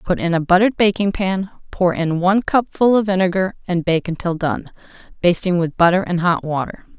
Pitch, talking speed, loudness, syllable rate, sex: 185 Hz, 190 wpm, -18 LUFS, 5.5 syllables/s, female